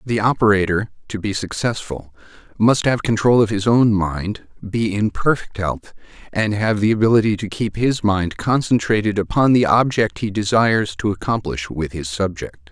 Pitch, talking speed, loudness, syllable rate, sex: 105 Hz, 165 wpm, -19 LUFS, 4.8 syllables/s, male